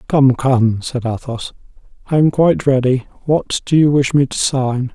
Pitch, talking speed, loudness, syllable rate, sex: 130 Hz, 180 wpm, -16 LUFS, 4.5 syllables/s, male